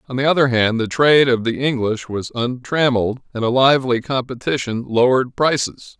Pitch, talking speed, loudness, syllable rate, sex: 125 Hz, 170 wpm, -18 LUFS, 5.6 syllables/s, male